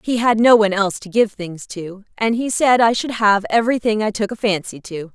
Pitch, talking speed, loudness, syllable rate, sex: 210 Hz, 255 wpm, -17 LUFS, 5.5 syllables/s, female